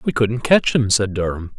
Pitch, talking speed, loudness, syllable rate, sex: 110 Hz, 230 wpm, -18 LUFS, 4.8 syllables/s, male